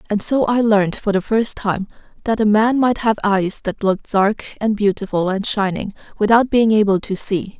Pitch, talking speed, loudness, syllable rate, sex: 210 Hz, 205 wpm, -18 LUFS, 4.8 syllables/s, female